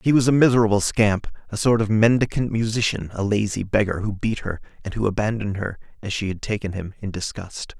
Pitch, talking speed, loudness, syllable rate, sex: 105 Hz, 210 wpm, -22 LUFS, 5.9 syllables/s, male